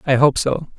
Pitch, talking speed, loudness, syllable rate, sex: 135 Hz, 230 wpm, -17 LUFS, 4.9 syllables/s, male